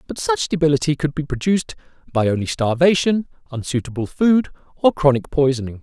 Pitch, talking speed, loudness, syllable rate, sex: 150 Hz, 145 wpm, -19 LUFS, 5.8 syllables/s, male